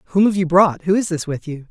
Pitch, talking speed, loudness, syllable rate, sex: 175 Hz, 315 wpm, -17 LUFS, 6.4 syllables/s, male